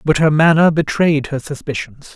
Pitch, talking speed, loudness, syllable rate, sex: 150 Hz, 165 wpm, -15 LUFS, 4.9 syllables/s, male